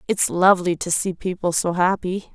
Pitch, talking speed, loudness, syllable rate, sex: 180 Hz, 180 wpm, -20 LUFS, 5.0 syllables/s, female